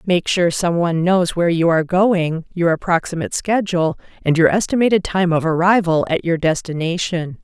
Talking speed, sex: 160 wpm, female